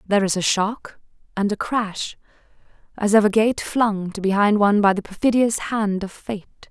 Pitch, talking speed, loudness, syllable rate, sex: 205 Hz, 190 wpm, -20 LUFS, 4.8 syllables/s, female